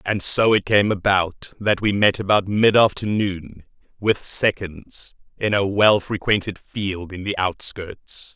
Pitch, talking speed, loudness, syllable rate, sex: 100 Hz, 150 wpm, -20 LUFS, 3.8 syllables/s, male